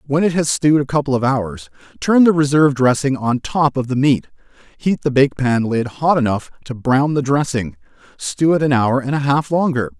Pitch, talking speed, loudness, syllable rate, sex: 135 Hz, 215 wpm, -17 LUFS, 5.2 syllables/s, male